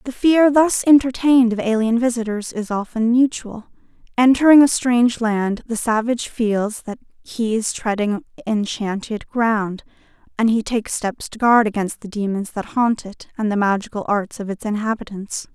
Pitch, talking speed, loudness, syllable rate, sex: 225 Hz, 160 wpm, -19 LUFS, 4.9 syllables/s, female